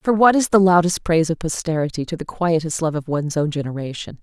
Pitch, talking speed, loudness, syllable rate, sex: 165 Hz, 225 wpm, -19 LUFS, 6.2 syllables/s, female